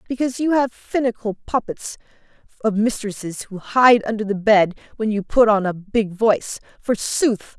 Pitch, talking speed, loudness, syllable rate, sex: 220 Hz, 160 wpm, -20 LUFS, 4.9 syllables/s, female